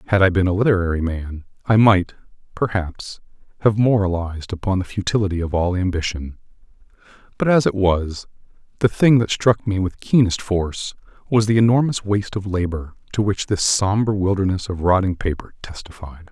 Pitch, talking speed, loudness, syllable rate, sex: 95 Hz, 160 wpm, -19 LUFS, 5.4 syllables/s, male